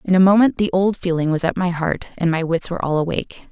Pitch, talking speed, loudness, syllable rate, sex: 175 Hz, 275 wpm, -19 LUFS, 6.4 syllables/s, female